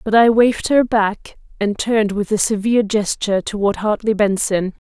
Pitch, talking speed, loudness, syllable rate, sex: 210 Hz, 170 wpm, -17 LUFS, 5.2 syllables/s, female